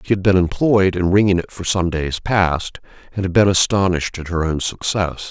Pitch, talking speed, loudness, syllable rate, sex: 90 Hz, 215 wpm, -18 LUFS, 5.2 syllables/s, male